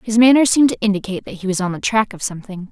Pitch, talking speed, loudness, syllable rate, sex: 210 Hz, 290 wpm, -17 LUFS, 7.8 syllables/s, female